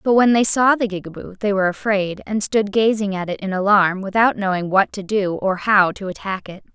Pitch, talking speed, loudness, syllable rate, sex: 200 Hz, 230 wpm, -18 LUFS, 5.4 syllables/s, female